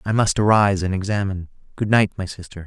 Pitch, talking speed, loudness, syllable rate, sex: 100 Hz, 205 wpm, -20 LUFS, 6.6 syllables/s, male